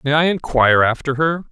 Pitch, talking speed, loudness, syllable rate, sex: 145 Hz, 200 wpm, -16 LUFS, 5.8 syllables/s, male